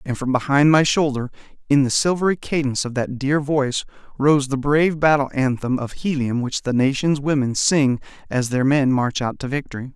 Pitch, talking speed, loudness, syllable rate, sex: 135 Hz, 195 wpm, -20 LUFS, 5.3 syllables/s, male